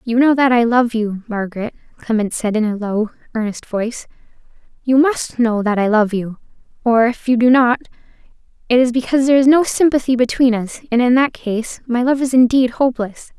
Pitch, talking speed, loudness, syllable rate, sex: 240 Hz, 195 wpm, -16 LUFS, 5.5 syllables/s, female